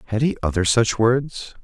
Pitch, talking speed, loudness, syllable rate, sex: 115 Hz, 185 wpm, -20 LUFS, 4.7 syllables/s, male